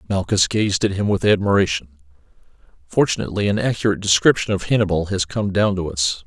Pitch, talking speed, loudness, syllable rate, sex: 95 Hz, 165 wpm, -19 LUFS, 6.3 syllables/s, male